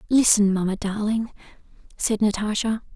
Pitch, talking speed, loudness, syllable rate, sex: 210 Hz, 100 wpm, -22 LUFS, 5.0 syllables/s, female